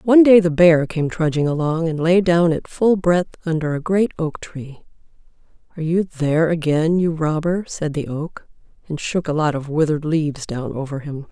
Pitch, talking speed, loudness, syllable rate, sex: 160 Hz, 195 wpm, -19 LUFS, 5.1 syllables/s, female